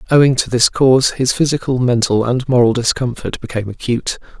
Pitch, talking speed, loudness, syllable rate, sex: 125 Hz, 165 wpm, -15 LUFS, 6.0 syllables/s, male